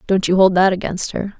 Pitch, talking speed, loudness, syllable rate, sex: 190 Hz, 260 wpm, -16 LUFS, 5.7 syllables/s, female